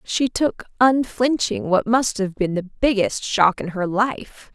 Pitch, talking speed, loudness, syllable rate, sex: 210 Hz, 170 wpm, -20 LUFS, 3.7 syllables/s, female